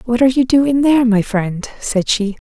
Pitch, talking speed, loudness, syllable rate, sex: 235 Hz, 220 wpm, -15 LUFS, 5.1 syllables/s, female